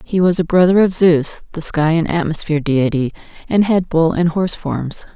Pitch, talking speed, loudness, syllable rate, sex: 165 Hz, 200 wpm, -16 LUFS, 5.1 syllables/s, female